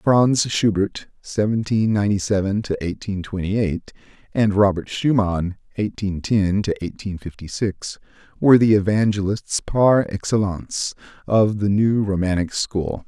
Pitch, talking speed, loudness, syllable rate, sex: 100 Hz, 130 wpm, -20 LUFS, 2.9 syllables/s, male